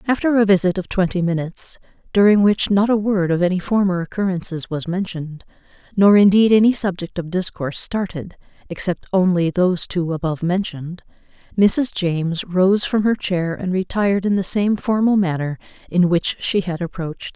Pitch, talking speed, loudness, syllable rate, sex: 185 Hz, 165 wpm, -19 LUFS, 5.4 syllables/s, female